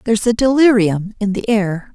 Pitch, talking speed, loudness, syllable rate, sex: 215 Hz, 185 wpm, -15 LUFS, 5.1 syllables/s, female